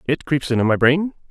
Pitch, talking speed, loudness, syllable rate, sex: 145 Hz, 230 wpm, -18 LUFS, 5.6 syllables/s, male